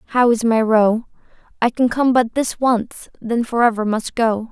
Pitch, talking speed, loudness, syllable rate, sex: 230 Hz, 200 wpm, -18 LUFS, 4.2 syllables/s, female